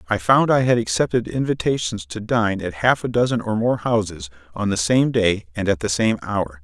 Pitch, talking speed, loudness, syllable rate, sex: 105 Hz, 215 wpm, -20 LUFS, 5.1 syllables/s, male